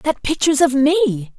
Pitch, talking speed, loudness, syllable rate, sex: 285 Hz, 215 wpm, -16 LUFS, 5.3 syllables/s, female